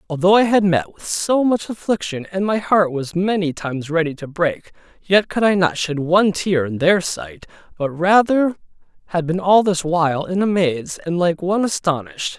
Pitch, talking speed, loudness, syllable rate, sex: 175 Hz, 200 wpm, -18 LUFS, 4.9 syllables/s, male